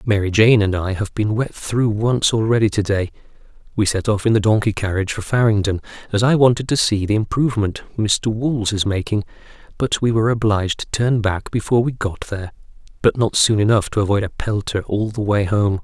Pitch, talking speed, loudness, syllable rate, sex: 105 Hz, 210 wpm, -18 LUFS, 5.7 syllables/s, male